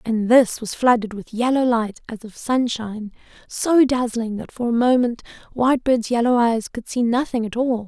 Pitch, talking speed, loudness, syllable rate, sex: 235 Hz, 185 wpm, -20 LUFS, 4.9 syllables/s, female